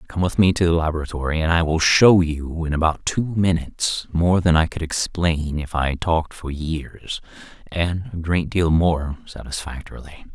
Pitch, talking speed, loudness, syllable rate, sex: 80 Hz, 180 wpm, -21 LUFS, 4.7 syllables/s, male